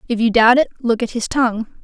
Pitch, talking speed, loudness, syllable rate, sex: 235 Hz, 260 wpm, -16 LUFS, 6.3 syllables/s, female